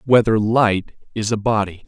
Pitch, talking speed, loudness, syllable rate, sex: 110 Hz, 160 wpm, -18 LUFS, 4.4 syllables/s, male